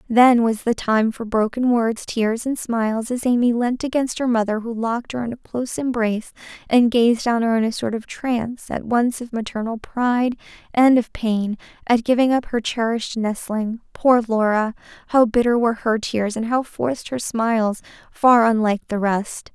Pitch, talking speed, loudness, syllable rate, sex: 230 Hz, 185 wpm, -20 LUFS, 5.0 syllables/s, female